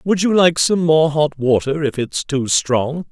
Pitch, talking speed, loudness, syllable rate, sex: 150 Hz, 210 wpm, -16 LUFS, 4.0 syllables/s, male